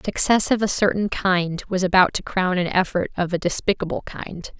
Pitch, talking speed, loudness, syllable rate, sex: 185 Hz, 195 wpm, -21 LUFS, 5.1 syllables/s, female